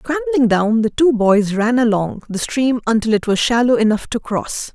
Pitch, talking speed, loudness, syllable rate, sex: 235 Hz, 200 wpm, -16 LUFS, 5.3 syllables/s, female